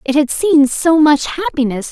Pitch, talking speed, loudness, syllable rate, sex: 290 Hz, 190 wpm, -13 LUFS, 4.4 syllables/s, female